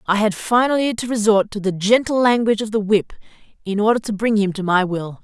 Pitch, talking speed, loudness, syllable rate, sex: 210 Hz, 230 wpm, -18 LUFS, 5.9 syllables/s, female